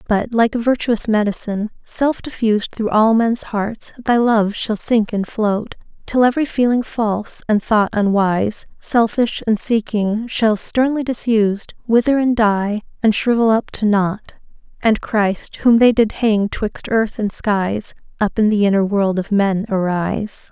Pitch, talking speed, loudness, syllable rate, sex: 215 Hz, 165 wpm, -17 LUFS, 4.2 syllables/s, female